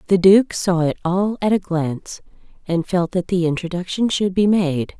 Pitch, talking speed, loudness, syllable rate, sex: 180 Hz, 190 wpm, -19 LUFS, 4.8 syllables/s, female